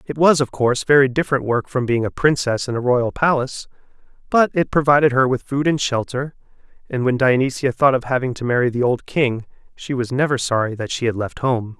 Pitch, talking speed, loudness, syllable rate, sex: 130 Hz, 220 wpm, -19 LUFS, 5.8 syllables/s, male